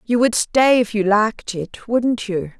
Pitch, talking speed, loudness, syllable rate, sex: 220 Hz, 210 wpm, -18 LUFS, 4.1 syllables/s, female